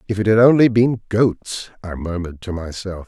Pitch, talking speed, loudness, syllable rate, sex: 100 Hz, 195 wpm, -18 LUFS, 5.1 syllables/s, male